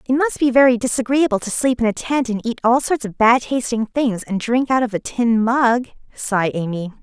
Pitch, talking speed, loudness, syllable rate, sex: 235 Hz, 230 wpm, -18 LUFS, 5.3 syllables/s, female